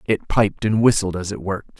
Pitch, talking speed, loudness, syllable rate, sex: 100 Hz, 235 wpm, -20 LUFS, 5.6 syllables/s, male